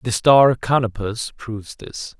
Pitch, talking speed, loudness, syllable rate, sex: 115 Hz, 135 wpm, -17 LUFS, 3.9 syllables/s, male